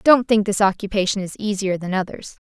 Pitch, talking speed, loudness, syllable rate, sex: 200 Hz, 195 wpm, -20 LUFS, 5.7 syllables/s, female